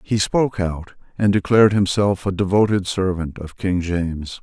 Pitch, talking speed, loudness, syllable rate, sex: 95 Hz, 165 wpm, -19 LUFS, 4.8 syllables/s, male